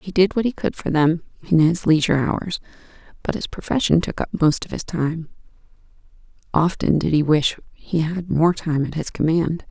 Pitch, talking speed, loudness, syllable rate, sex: 165 Hz, 190 wpm, -21 LUFS, 5.0 syllables/s, female